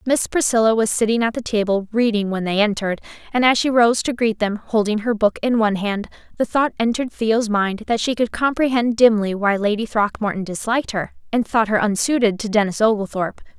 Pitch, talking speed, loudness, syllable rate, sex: 220 Hz, 205 wpm, -19 LUFS, 5.7 syllables/s, female